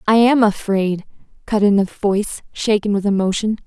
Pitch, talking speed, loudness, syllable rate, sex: 205 Hz, 165 wpm, -18 LUFS, 5.0 syllables/s, female